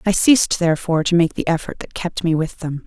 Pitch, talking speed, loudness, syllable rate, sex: 170 Hz, 250 wpm, -18 LUFS, 6.3 syllables/s, female